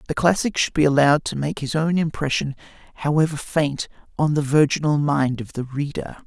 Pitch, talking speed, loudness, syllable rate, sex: 145 Hz, 180 wpm, -21 LUFS, 5.5 syllables/s, male